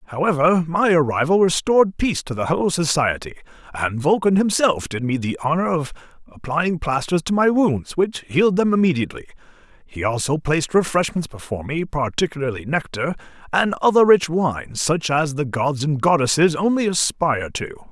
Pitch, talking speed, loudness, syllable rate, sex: 160 Hz, 155 wpm, -20 LUFS, 5.5 syllables/s, male